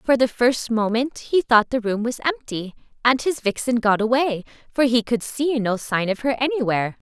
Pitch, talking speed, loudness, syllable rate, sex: 240 Hz, 205 wpm, -21 LUFS, 5.0 syllables/s, female